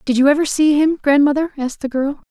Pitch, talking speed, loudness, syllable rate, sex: 285 Hz, 235 wpm, -16 LUFS, 6.3 syllables/s, female